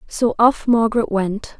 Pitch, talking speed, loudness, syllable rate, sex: 220 Hz, 150 wpm, -18 LUFS, 4.3 syllables/s, female